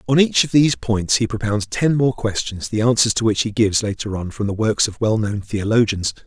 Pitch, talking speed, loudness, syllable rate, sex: 110 Hz, 230 wpm, -19 LUFS, 5.5 syllables/s, male